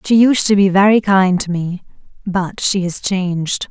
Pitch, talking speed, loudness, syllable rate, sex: 190 Hz, 195 wpm, -15 LUFS, 4.4 syllables/s, female